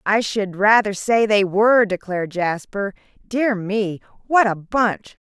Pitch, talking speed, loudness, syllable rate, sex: 205 Hz, 150 wpm, -19 LUFS, 4.0 syllables/s, female